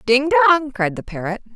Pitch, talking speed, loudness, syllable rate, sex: 250 Hz, 195 wpm, -18 LUFS, 5.2 syllables/s, female